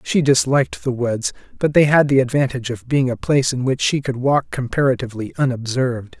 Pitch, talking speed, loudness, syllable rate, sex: 125 Hz, 195 wpm, -18 LUFS, 5.9 syllables/s, male